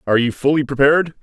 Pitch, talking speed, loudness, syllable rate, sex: 140 Hz, 195 wpm, -16 LUFS, 7.8 syllables/s, male